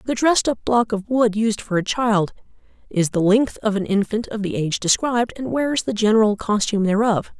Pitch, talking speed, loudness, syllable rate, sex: 215 Hz, 210 wpm, -20 LUFS, 5.5 syllables/s, female